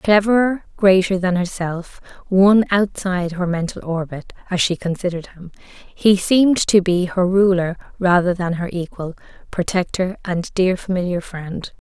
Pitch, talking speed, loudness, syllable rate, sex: 185 Hz, 140 wpm, -18 LUFS, 4.7 syllables/s, female